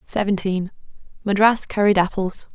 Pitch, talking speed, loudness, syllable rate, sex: 195 Hz, 70 wpm, -20 LUFS, 5.0 syllables/s, female